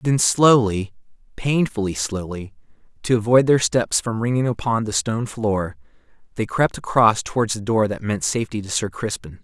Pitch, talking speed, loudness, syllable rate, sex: 110 Hz, 155 wpm, -20 LUFS, 5.0 syllables/s, male